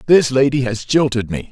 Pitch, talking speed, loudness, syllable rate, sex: 130 Hz, 195 wpm, -16 LUFS, 5.3 syllables/s, male